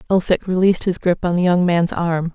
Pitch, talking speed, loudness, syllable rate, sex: 175 Hz, 230 wpm, -18 LUFS, 5.6 syllables/s, female